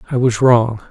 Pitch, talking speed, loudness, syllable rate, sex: 120 Hz, 200 wpm, -14 LUFS, 4.8 syllables/s, male